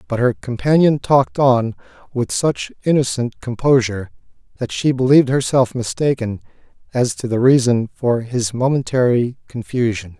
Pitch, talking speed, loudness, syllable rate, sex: 125 Hz, 130 wpm, -17 LUFS, 4.9 syllables/s, male